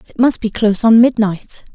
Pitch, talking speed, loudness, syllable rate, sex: 220 Hz, 205 wpm, -13 LUFS, 5.2 syllables/s, female